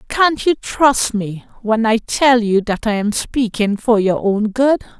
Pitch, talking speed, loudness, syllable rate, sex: 230 Hz, 190 wpm, -16 LUFS, 3.8 syllables/s, female